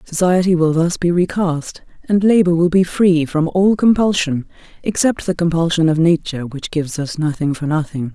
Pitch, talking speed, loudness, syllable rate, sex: 170 Hz, 175 wpm, -16 LUFS, 5.1 syllables/s, female